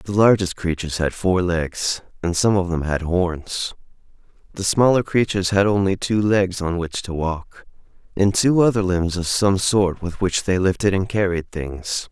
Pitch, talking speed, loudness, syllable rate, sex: 95 Hz, 185 wpm, -20 LUFS, 4.5 syllables/s, male